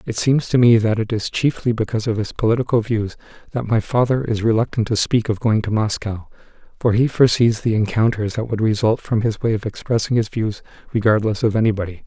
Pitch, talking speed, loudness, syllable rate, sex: 110 Hz, 210 wpm, -19 LUFS, 5.9 syllables/s, male